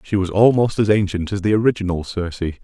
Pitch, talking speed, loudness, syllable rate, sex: 100 Hz, 205 wpm, -18 LUFS, 6.5 syllables/s, male